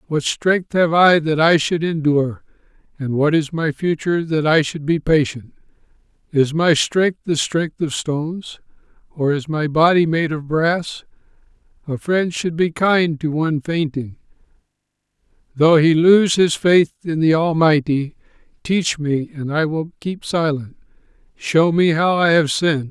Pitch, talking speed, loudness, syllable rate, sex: 160 Hz, 160 wpm, -18 LUFS, 4.3 syllables/s, male